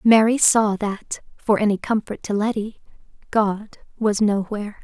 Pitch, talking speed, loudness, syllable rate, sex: 210 Hz, 135 wpm, -21 LUFS, 4.3 syllables/s, female